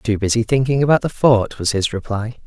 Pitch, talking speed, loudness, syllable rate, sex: 115 Hz, 220 wpm, -17 LUFS, 5.4 syllables/s, male